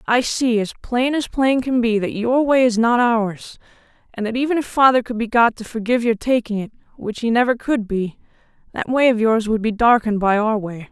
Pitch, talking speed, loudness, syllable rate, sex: 230 Hz, 230 wpm, -18 LUFS, 5.1 syllables/s, female